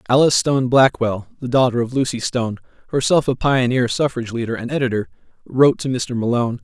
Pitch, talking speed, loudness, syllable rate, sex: 125 Hz, 170 wpm, -18 LUFS, 6.4 syllables/s, male